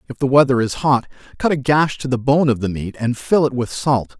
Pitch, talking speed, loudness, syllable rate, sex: 130 Hz, 270 wpm, -18 LUFS, 5.4 syllables/s, male